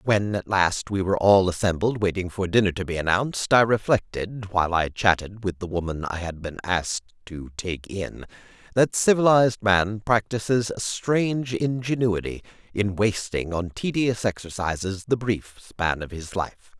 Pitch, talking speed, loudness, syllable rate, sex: 100 Hz, 165 wpm, -24 LUFS, 4.9 syllables/s, male